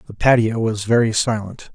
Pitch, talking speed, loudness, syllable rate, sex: 110 Hz, 170 wpm, -18 LUFS, 5.0 syllables/s, male